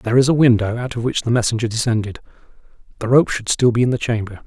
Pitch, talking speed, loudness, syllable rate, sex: 115 Hz, 240 wpm, -18 LUFS, 6.9 syllables/s, male